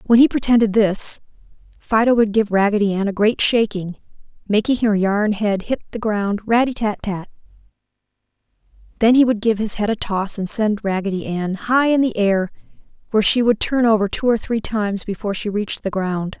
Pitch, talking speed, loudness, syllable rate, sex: 210 Hz, 190 wpm, -18 LUFS, 5.3 syllables/s, female